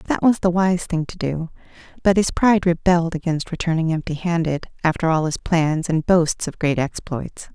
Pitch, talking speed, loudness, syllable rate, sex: 170 Hz, 190 wpm, -20 LUFS, 5.0 syllables/s, female